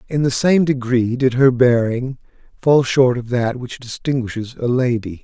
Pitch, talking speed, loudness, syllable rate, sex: 125 Hz, 170 wpm, -17 LUFS, 4.5 syllables/s, male